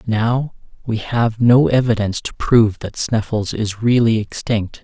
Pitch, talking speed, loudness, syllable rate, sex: 110 Hz, 150 wpm, -17 LUFS, 4.4 syllables/s, male